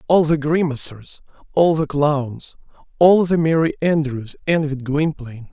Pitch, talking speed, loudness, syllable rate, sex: 150 Hz, 130 wpm, -18 LUFS, 4.3 syllables/s, male